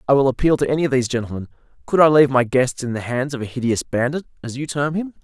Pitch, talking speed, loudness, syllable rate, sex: 135 Hz, 275 wpm, -19 LUFS, 7.1 syllables/s, male